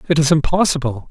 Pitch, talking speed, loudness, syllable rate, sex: 150 Hz, 165 wpm, -16 LUFS, 6.5 syllables/s, male